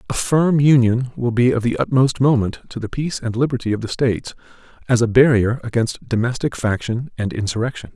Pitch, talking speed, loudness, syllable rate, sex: 120 Hz, 190 wpm, -18 LUFS, 5.7 syllables/s, male